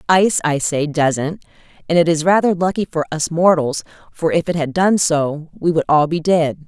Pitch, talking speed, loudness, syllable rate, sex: 160 Hz, 205 wpm, -17 LUFS, 4.9 syllables/s, female